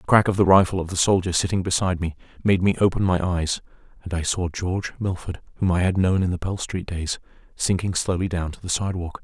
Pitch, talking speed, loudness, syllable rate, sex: 90 Hz, 235 wpm, -23 LUFS, 6.2 syllables/s, male